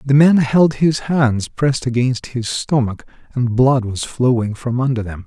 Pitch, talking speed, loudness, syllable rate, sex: 125 Hz, 180 wpm, -17 LUFS, 4.4 syllables/s, male